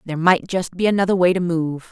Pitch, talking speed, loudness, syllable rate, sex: 175 Hz, 250 wpm, -19 LUFS, 6.1 syllables/s, female